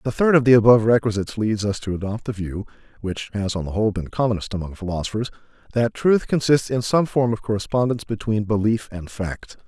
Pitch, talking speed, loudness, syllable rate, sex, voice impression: 110 Hz, 190 wpm, -21 LUFS, 6.1 syllables/s, male, very masculine, very middle-aged, very thick, very tensed, powerful, bright, soft, muffled, fluent, very cool, very intellectual, refreshing, sincere, calm, very mature, very friendly, reassuring, very unique, elegant, wild, sweet, lively, kind, slightly intense